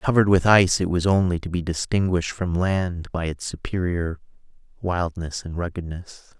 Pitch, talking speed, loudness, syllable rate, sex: 90 Hz, 160 wpm, -23 LUFS, 5.1 syllables/s, male